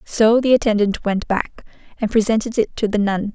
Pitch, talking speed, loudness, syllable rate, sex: 220 Hz, 195 wpm, -18 LUFS, 5.1 syllables/s, female